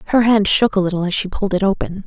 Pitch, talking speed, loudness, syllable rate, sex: 200 Hz, 290 wpm, -17 LUFS, 7.2 syllables/s, female